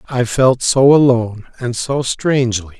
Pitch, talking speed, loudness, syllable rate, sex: 125 Hz, 150 wpm, -14 LUFS, 4.6 syllables/s, male